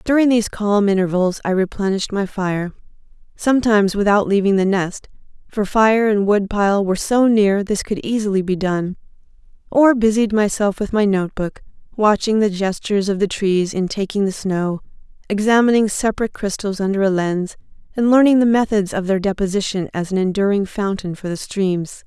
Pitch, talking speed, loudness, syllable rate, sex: 200 Hz, 160 wpm, -18 LUFS, 5.4 syllables/s, female